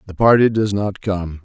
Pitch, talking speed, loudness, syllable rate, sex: 100 Hz, 210 wpm, -17 LUFS, 4.8 syllables/s, male